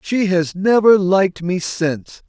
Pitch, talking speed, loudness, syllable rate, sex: 185 Hz, 160 wpm, -16 LUFS, 4.2 syllables/s, male